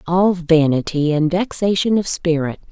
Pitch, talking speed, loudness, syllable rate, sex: 170 Hz, 135 wpm, -17 LUFS, 4.4 syllables/s, female